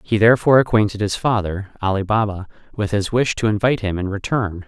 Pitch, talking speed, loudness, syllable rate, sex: 105 Hz, 195 wpm, -19 LUFS, 6.2 syllables/s, male